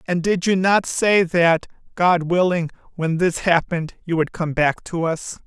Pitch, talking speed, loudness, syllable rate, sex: 170 Hz, 185 wpm, -19 LUFS, 4.3 syllables/s, female